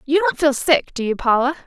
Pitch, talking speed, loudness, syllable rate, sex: 290 Hz, 250 wpm, -18 LUFS, 5.5 syllables/s, female